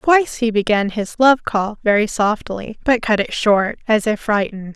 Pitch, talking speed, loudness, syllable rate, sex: 220 Hz, 190 wpm, -17 LUFS, 4.6 syllables/s, female